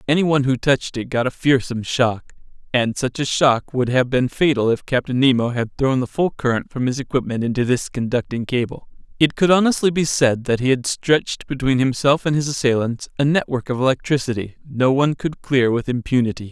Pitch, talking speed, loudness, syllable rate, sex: 130 Hz, 200 wpm, -19 LUFS, 5.6 syllables/s, male